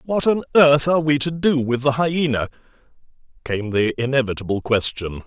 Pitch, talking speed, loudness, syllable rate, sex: 135 Hz, 160 wpm, -19 LUFS, 5.2 syllables/s, male